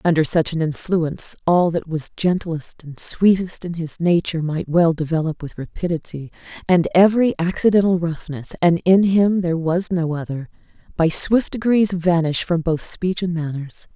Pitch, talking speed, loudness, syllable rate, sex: 170 Hz, 155 wpm, -19 LUFS, 4.8 syllables/s, female